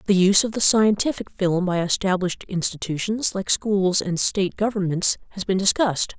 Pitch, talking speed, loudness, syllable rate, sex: 195 Hz, 165 wpm, -21 LUFS, 5.3 syllables/s, female